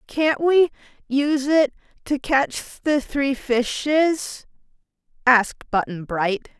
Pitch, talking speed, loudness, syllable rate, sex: 270 Hz, 110 wpm, -21 LUFS, 3.3 syllables/s, female